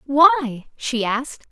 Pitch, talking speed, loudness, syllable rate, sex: 270 Hz, 120 wpm, -19 LUFS, 3.2 syllables/s, female